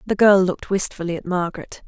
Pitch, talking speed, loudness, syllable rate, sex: 185 Hz, 190 wpm, -20 LUFS, 6.2 syllables/s, female